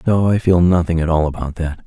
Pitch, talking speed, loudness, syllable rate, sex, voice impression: 85 Hz, 255 wpm, -16 LUFS, 5.8 syllables/s, male, masculine, adult-like, slightly thick, slightly dark, slightly cool, sincere, calm, slightly reassuring